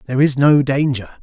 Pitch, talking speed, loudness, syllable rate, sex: 135 Hz, 195 wpm, -15 LUFS, 6.3 syllables/s, male